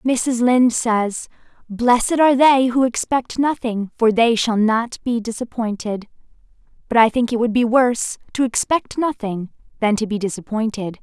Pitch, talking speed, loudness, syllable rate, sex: 235 Hz, 160 wpm, -18 LUFS, 4.6 syllables/s, female